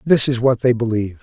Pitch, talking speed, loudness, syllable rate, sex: 120 Hz, 245 wpm, -17 LUFS, 6.3 syllables/s, male